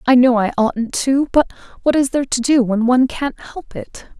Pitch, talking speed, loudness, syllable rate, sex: 255 Hz, 230 wpm, -16 LUFS, 5.1 syllables/s, female